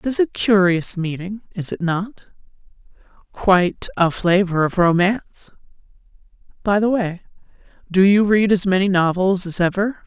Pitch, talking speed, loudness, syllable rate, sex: 190 Hz, 135 wpm, -18 LUFS, 4.7 syllables/s, female